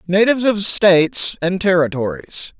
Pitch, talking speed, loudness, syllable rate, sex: 185 Hz, 115 wpm, -16 LUFS, 4.6 syllables/s, male